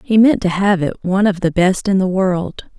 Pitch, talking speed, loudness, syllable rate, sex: 190 Hz, 260 wpm, -15 LUFS, 4.9 syllables/s, female